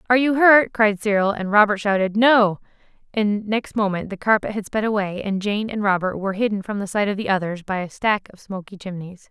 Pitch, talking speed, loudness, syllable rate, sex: 205 Hz, 225 wpm, -20 LUFS, 5.6 syllables/s, female